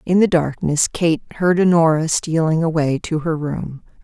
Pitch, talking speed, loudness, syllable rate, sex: 160 Hz, 165 wpm, -18 LUFS, 4.5 syllables/s, female